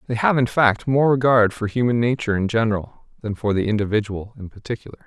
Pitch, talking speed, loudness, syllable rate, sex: 115 Hz, 200 wpm, -20 LUFS, 6.1 syllables/s, male